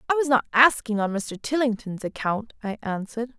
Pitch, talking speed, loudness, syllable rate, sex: 235 Hz, 175 wpm, -24 LUFS, 5.4 syllables/s, female